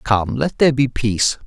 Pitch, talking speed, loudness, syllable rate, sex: 120 Hz, 205 wpm, -18 LUFS, 5.3 syllables/s, male